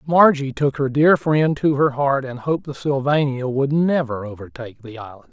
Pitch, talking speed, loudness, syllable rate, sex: 140 Hz, 190 wpm, -19 LUFS, 5.2 syllables/s, male